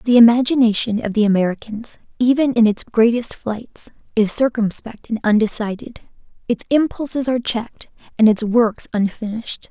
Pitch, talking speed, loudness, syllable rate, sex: 230 Hz, 135 wpm, -18 LUFS, 5.1 syllables/s, female